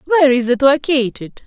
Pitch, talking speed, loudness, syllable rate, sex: 270 Hz, 165 wpm, -14 LUFS, 6.9 syllables/s, female